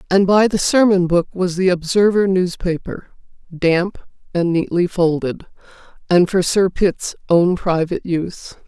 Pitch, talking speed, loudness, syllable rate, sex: 180 Hz, 140 wpm, -17 LUFS, 4.4 syllables/s, female